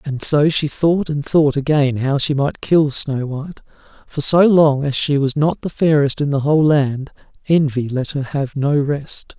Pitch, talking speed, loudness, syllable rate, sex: 145 Hz, 205 wpm, -17 LUFS, 4.4 syllables/s, male